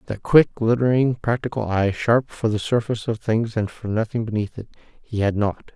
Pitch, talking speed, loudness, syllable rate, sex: 115 Hz, 200 wpm, -21 LUFS, 5.0 syllables/s, male